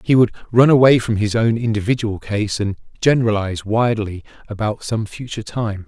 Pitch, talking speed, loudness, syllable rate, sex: 110 Hz, 165 wpm, -18 LUFS, 5.7 syllables/s, male